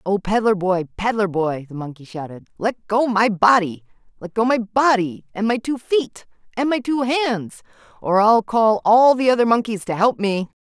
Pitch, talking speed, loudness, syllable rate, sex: 215 Hz, 190 wpm, -19 LUFS, 4.7 syllables/s, female